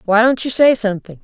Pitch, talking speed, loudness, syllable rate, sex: 225 Hz, 245 wpm, -15 LUFS, 6.3 syllables/s, female